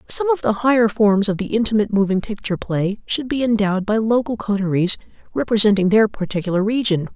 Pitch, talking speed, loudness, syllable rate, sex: 210 Hz, 175 wpm, -18 LUFS, 6.1 syllables/s, female